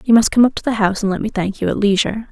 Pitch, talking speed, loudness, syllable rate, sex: 215 Hz, 365 wpm, -16 LUFS, 7.7 syllables/s, female